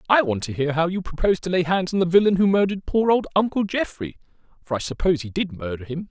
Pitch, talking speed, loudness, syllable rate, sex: 175 Hz, 245 wpm, -22 LUFS, 6.7 syllables/s, male